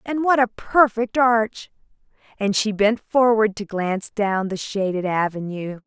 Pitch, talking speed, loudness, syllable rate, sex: 215 Hz, 155 wpm, -21 LUFS, 4.2 syllables/s, female